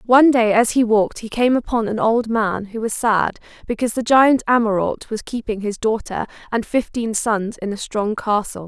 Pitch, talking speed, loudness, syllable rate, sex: 225 Hz, 200 wpm, -19 LUFS, 5.1 syllables/s, female